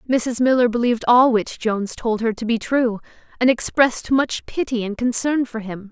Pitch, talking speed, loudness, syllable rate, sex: 235 Hz, 195 wpm, -19 LUFS, 4.9 syllables/s, female